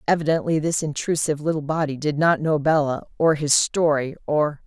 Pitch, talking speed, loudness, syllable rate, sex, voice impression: 150 Hz, 165 wpm, -21 LUFS, 5.4 syllables/s, female, feminine, very adult-like, intellectual, slightly elegant, slightly strict